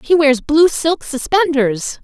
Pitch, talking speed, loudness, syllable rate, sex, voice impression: 295 Hz, 150 wpm, -15 LUFS, 3.7 syllables/s, female, very feminine, slightly young, slightly adult-like, thin, tensed, slightly powerful, bright, slightly hard, clear, slightly cute, very refreshing, slightly sincere, slightly calm, friendly, reassuring, lively, slightly strict, slightly sharp